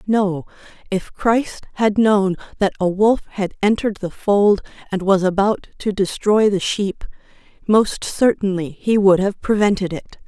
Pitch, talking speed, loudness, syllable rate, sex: 200 Hz, 150 wpm, -18 LUFS, 4.2 syllables/s, female